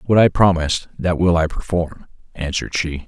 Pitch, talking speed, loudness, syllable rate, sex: 85 Hz, 175 wpm, -19 LUFS, 5.2 syllables/s, male